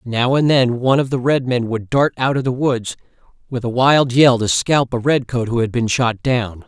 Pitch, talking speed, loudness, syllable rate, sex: 125 Hz, 250 wpm, -17 LUFS, 4.9 syllables/s, male